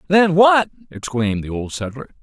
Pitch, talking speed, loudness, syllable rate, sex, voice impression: 150 Hz, 160 wpm, -17 LUFS, 5.3 syllables/s, male, masculine, middle-aged, thick, tensed, powerful, slightly hard, clear, slightly raspy, cool, intellectual, calm, mature, friendly, reassuring, wild, lively, slightly strict